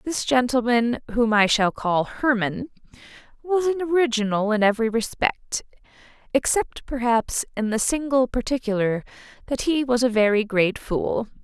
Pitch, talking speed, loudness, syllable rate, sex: 240 Hz, 130 wpm, -22 LUFS, 4.6 syllables/s, female